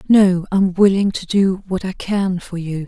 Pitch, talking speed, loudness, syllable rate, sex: 185 Hz, 210 wpm, -17 LUFS, 4.2 syllables/s, female